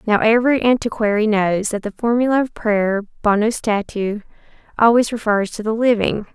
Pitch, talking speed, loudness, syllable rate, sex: 215 Hz, 150 wpm, -18 LUFS, 5.2 syllables/s, female